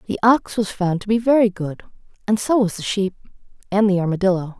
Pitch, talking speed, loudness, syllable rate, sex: 200 Hz, 210 wpm, -19 LUFS, 5.9 syllables/s, female